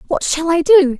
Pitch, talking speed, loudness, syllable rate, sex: 325 Hz, 240 wpm, -14 LUFS, 4.9 syllables/s, female